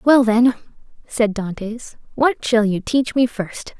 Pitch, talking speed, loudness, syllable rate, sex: 230 Hz, 160 wpm, -19 LUFS, 3.7 syllables/s, female